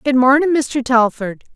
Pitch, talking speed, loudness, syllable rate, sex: 260 Hz, 155 wpm, -15 LUFS, 3.7 syllables/s, female